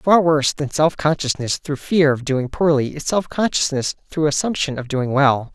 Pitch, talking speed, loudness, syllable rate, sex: 145 Hz, 195 wpm, -19 LUFS, 4.8 syllables/s, male